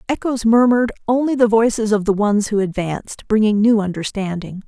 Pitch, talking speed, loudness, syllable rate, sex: 215 Hz, 165 wpm, -17 LUFS, 5.6 syllables/s, female